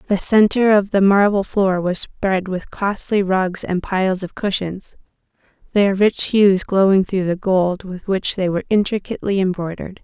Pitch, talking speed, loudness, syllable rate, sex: 190 Hz, 165 wpm, -18 LUFS, 4.7 syllables/s, female